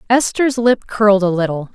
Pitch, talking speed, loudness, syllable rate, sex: 215 Hz, 170 wpm, -15 LUFS, 5.4 syllables/s, female